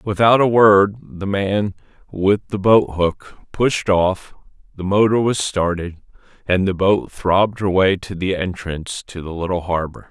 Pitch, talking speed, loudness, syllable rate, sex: 95 Hz, 165 wpm, -18 LUFS, 4.2 syllables/s, male